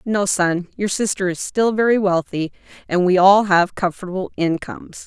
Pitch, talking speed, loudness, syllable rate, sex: 190 Hz, 165 wpm, -18 LUFS, 4.9 syllables/s, female